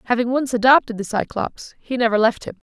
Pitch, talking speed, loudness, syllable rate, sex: 240 Hz, 200 wpm, -19 LUFS, 5.9 syllables/s, female